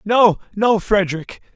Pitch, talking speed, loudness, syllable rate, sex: 200 Hz, 115 wpm, -17 LUFS, 4.2 syllables/s, male